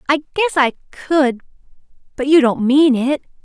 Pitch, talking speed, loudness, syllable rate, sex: 280 Hz, 140 wpm, -16 LUFS, 5.7 syllables/s, female